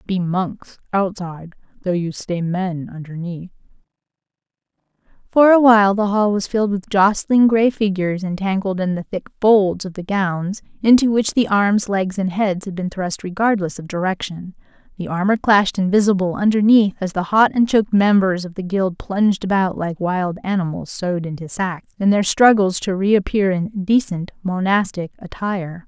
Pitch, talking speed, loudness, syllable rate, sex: 190 Hz, 165 wpm, -18 LUFS, 4.9 syllables/s, female